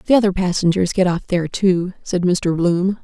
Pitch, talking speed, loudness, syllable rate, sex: 185 Hz, 200 wpm, -18 LUFS, 5.1 syllables/s, female